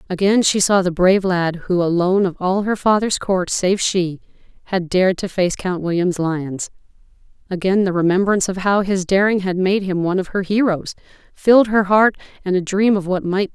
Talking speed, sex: 215 wpm, female